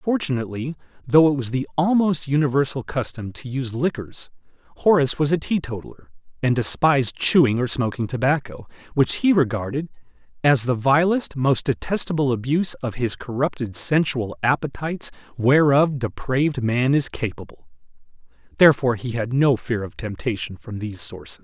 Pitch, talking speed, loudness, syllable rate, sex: 130 Hz, 140 wpm, -21 LUFS, 5.4 syllables/s, male